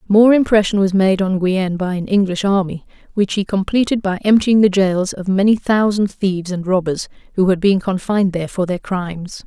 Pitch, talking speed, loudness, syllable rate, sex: 195 Hz, 195 wpm, -16 LUFS, 5.4 syllables/s, female